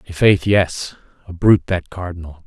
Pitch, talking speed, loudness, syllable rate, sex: 90 Hz, 145 wpm, -17 LUFS, 5.2 syllables/s, male